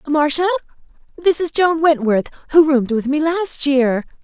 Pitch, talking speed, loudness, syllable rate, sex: 295 Hz, 155 wpm, -16 LUFS, 4.9 syllables/s, female